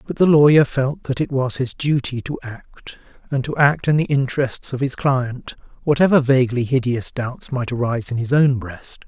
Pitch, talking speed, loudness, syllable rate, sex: 130 Hz, 200 wpm, -19 LUFS, 5.1 syllables/s, male